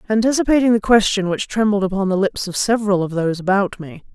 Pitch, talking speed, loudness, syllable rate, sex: 200 Hz, 205 wpm, -18 LUFS, 6.4 syllables/s, female